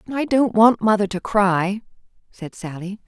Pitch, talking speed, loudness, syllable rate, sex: 205 Hz, 155 wpm, -19 LUFS, 4.3 syllables/s, female